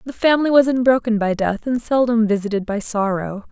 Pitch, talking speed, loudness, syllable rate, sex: 225 Hz, 190 wpm, -18 LUFS, 5.6 syllables/s, female